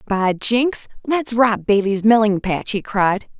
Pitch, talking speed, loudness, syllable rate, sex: 215 Hz, 160 wpm, -18 LUFS, 3.7 syllables/s, female